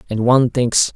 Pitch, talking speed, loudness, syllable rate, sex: 120 Hz, 190 wpm, -15 LUFS, 5.2 syllables/s, male